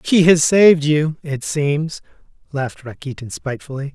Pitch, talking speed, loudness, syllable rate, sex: 150 Hz, 135 wpm, -17 LUFS, 4.9 syllables/s, male